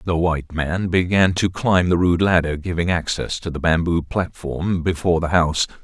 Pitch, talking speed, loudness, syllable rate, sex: 85 Hz, 185 wpm, -20 LUFS, 5.0 syllables/s, male